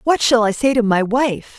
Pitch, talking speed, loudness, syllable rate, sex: 235 Hz, 265 wpm, -16 LUFS, 4.7 syllables/s, female